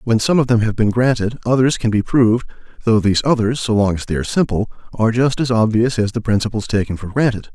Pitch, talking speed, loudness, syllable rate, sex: 115 Hz, 240 wpm, -17 LUFS, 6.4 syllables/s, male